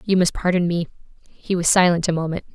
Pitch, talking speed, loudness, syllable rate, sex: 175 Hz, 210 wpm, -20 LUFS, 6.1 syllables/s, female